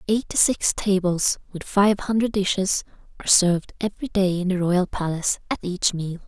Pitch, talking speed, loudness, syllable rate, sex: 190 Hz, 170 wpm, -22 LUFS, 5.2 syllables/s, female